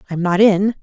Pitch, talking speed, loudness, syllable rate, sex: 195 Hz, 220 wpm, -15 LUFS, 5.0 syllables/s, female